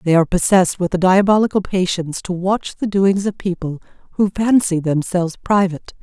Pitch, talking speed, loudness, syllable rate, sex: 185 Hz, 170 wpm, -17 LUFS, 5.7 syllables/s, female